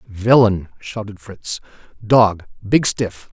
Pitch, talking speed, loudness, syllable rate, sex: 105 Hz, 90 wpm, -17 LUFS, 3.4 syllables/s, male